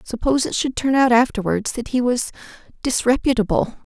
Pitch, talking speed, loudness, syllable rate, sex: 245 Hz, 135 wpm, -20 LUFS, 5.7 syllables/s, female